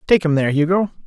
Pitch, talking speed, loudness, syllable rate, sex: 165 Hz, 225 wpm, -17 LUFS, 7.6 syllables/s, male